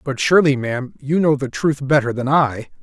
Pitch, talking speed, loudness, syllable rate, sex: 140 Hz, 210 wpm, -18 LUFS, 5.4 syllables/s, male